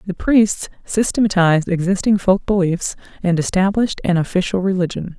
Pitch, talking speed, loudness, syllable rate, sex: 185 Hz, 125 wpm, -17 LUFS, 5.4 syllables/s, female